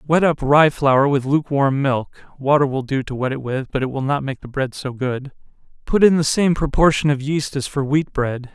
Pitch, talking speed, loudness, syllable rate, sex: 140 Hz, 240 wpm, -19 LUFS, 3.2 syllables/s, male